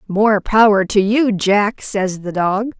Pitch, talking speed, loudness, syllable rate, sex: 205 Hz, 170 wpm, -15 LUFS, 3.4 syllables/s, female